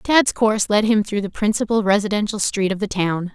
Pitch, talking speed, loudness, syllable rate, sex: 210 Hz, 215 wpm, -19 LUFS, 5.4 syllables/s, female